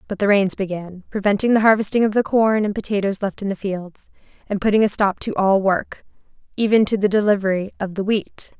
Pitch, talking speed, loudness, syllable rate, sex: 205 Hz, 210 wpm, -19 LUFS, 5.7 syllables/s, female